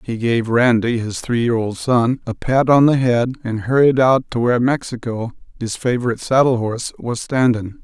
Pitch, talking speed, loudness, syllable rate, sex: 120 Hz, 190 wpm, -17 LUFS, 5.0 syllables/s, male